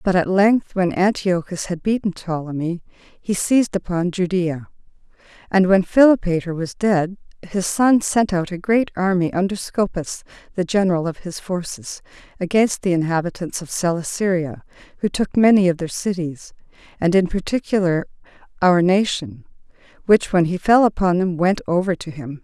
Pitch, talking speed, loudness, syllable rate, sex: 185 Hz, 150 wpm, -19 LUFS, 4.9 syllables/s, female